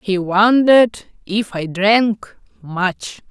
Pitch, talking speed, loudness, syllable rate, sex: 205 Hz, 110 wpm, -15 LUFS, 3.0 syllables/s, female